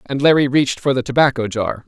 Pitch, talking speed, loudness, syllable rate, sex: 130 Hz, 225 wpm, -17 LUFS, 6.2 syllables/s, male